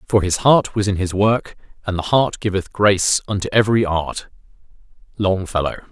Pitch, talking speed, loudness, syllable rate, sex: 100 Hz, 160 wpm, -18 LUFS, 5.2 syllables/s, male